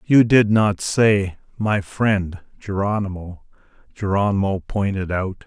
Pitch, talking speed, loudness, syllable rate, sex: 100 Hz, 110 wpm, -20 LUFS, 3.8 syllables/s, male